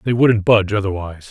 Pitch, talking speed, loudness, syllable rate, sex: 105 Hz, 185 wpm, -16 LUFS, 6.7 syllables/s, male